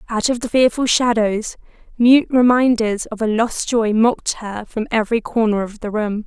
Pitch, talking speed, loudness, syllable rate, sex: 225 Hz, 180 wpm, -17 LUFS, 4.8 syllables/s, female